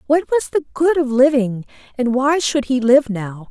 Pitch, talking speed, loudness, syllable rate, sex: 255 Hz, 205 wpm, -17 LUFS, 4.4 syllables/s, female